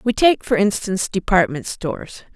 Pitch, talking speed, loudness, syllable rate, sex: 200 Hz, 155 wpm, -19 LUFS, 5.1 syllables/s, female